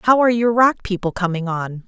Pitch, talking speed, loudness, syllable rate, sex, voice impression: 205 Hz, 225 wpm, -18 LUFS, 5.7 syllables/s, female, very feminine, slightly gender-neutral, adult-like, slightly middle-aged, slightly thin, tensed, slightly powerful, slightly dark, slightly soft, clear, slightly fluent, slightly cute, slightly cool, intellectual, refreshing, very sincere, calm, friendly, reassuring, slightly unique, elegant, sweet, slightly lively, slightly strict, slightly intense, slightly sharp